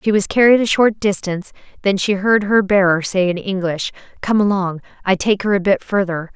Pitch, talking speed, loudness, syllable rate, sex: 195 Hz, 210 wpm, -17 LUFS, 5.4 syllables/s, female